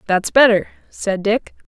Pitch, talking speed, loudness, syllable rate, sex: 210 Hz, 140 wpm, -17 LUFS, 4.3 syllables/s, female